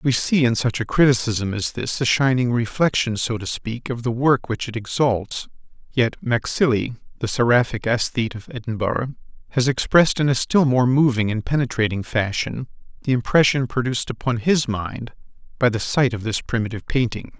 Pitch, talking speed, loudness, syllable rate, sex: 120 Hz, 170 wpm, -21 LUFS, 5.2 syllables/s, male